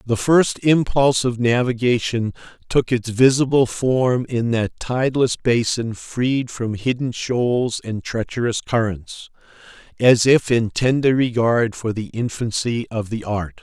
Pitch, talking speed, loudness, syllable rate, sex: 120 Hz, 135 wpm, -19 LUFS, 4.0 syllables/s, male